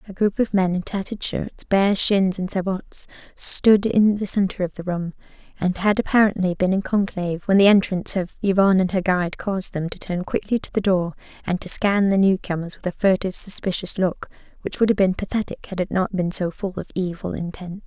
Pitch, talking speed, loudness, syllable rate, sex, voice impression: 190 Hz, 220 wpm, -21 LUFS, 5.6 syllables/s, female, feminine, slightly adult-like, slightly muffled, slightly cute, sincere, slightly calm, slightly unique, slightly kind